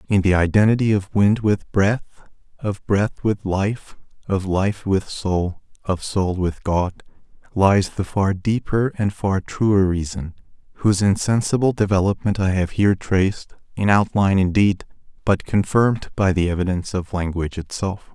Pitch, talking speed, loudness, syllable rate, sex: 100 Hz, 150 wpm, -20 LUFS, 4.6 syllables/s, male